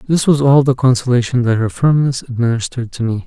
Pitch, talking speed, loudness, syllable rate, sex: 125 Hz, 200 wpm, -15 LUFS, 6.2 syllables/s, male